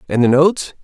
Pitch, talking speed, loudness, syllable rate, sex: 145 Hz, 215 wpm, -14 LUFS, 6.7 syllables/s, male